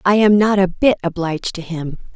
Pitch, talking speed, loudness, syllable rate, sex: 185 Hz, 225 wpm, -17 LUFS, 5.5 syllables/s, female